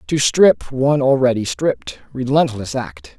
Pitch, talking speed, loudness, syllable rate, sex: 125 Hz, 115 wpm, -17 LUFS, 4.5 syllables/s, male